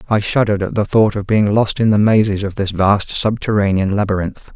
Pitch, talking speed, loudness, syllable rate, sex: 100 Hz, 210 wpm, -16 LUFS, 5.5 syllables/s, male